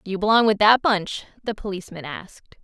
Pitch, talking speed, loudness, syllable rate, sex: 200 Hz, 205 wpm, -20 LUFS, 6.4 syllables/s, female